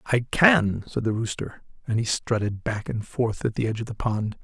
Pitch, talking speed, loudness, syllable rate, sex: 115 Hz, 230 wpm, -25 LUFS, 5.2 syllables/s, male